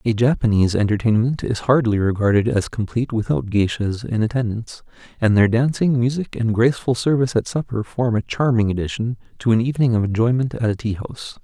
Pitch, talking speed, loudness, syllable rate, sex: 115 Hz, 180 wpm, -19 LUFS, 6.0 syllables/s, male